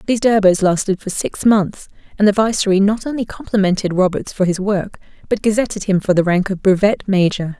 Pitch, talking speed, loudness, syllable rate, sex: 200 Hz, 195 wpm, -16 LUFS, 5.7 syllables/s, female